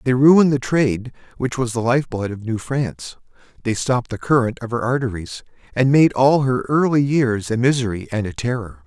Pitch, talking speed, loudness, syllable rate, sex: 125 Hz, 205 wpm, -19 LUFS, 5.4 syllables/s, male